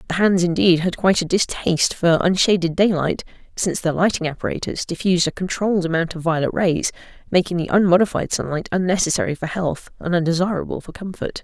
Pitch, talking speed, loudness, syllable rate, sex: 175 Hz, 170 wpm, -20 LUFS, 6.2 syllables/s, female